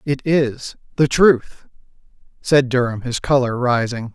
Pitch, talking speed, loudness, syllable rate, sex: 130 Hz, 130 wpm, -18 LUFS, 3.9 syllables/s, male